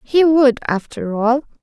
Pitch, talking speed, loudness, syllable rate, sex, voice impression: 255 Hz, 150 wpm, -16 LUFS, 3.9 syllables/s, female, feminine, slightly young, tensed, slightly powerful, bright, soft, halting, cute, calm, friendly, sweet, slightly lively, slightly kind, modest